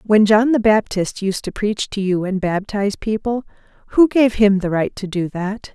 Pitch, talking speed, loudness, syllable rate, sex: 205 Hz, 210 wpm, -18 LUFS, 4.7 syllables/s, female